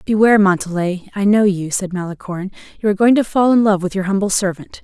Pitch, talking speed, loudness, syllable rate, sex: 195 Hz, 225 wpm, -16 LUFS, 6.4 syllables/s, female